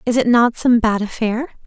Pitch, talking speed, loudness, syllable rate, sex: 235 Hz, 215 wpm, -16 LUFS, 5.0 syllables/s, female